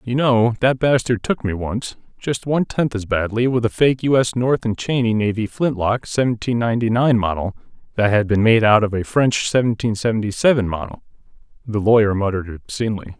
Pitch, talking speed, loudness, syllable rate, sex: 115 Hz, 190 wpm, -18 LUFS, 5.6 syllables/s, male